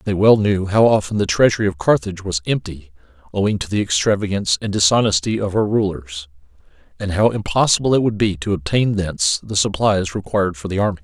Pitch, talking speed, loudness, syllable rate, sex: 95 Hz, 190 wpm, -18 LUFS, 6.1 syllables/s, male